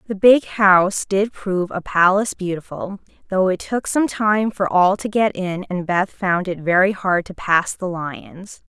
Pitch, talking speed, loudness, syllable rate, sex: 190 Hz, 195 wpm, -19 LUFS, 4.3 syllables/s, female